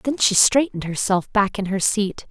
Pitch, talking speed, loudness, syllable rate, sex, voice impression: 210 Hz, 210 wpm, -19 LUFS, 4.9 syllables/s, female, feminine, adult-like, tensed, powerful, slightly hard, clear, fluent, intellectual, slightly friendly, elegant, lively, intense, sharp